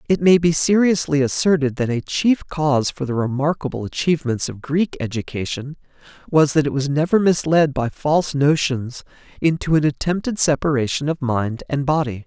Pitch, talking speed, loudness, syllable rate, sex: 145 Hz, 160 wpm, -19 LUFS, 5.2 syllables/s, male